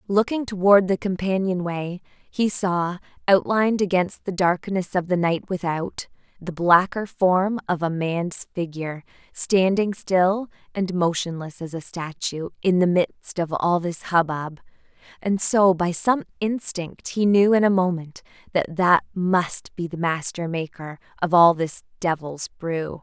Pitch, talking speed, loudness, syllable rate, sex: 180 Hz, 150 wpm, -22 LUFS, 4.0 syllables/s, female